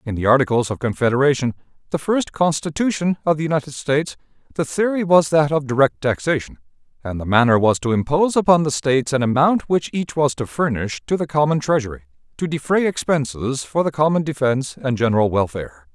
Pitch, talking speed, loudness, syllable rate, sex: 140 Hz, 185 wpm, -19 LUFS, 6.1 syllables/s, male